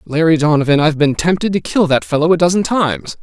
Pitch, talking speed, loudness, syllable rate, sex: 155 Hz, 225 wpm, -14 LUFS, 6.5 syllables/s, male